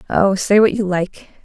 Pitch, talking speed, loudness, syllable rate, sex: 195 Hz, 210 wpm, -16 LUFS, 4.5 syllables/s, female